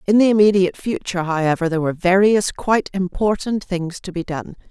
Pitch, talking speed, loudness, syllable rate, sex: 185 Hz, 180 wpm, -19 LUFS, 6.1 syllables/s, female